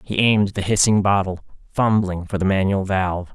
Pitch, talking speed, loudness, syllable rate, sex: 100 Hz, 180 wpm, -19 LUFS, 5.4 syllables/s, male